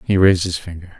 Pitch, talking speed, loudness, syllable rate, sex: 90 Hz, 240 wpm, -17 LUFS, 7.1 syllables/s, male